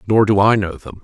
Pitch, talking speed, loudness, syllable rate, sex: 105 Hz, 290 wpm, -15 LUFS, 5.8 syllables/s, male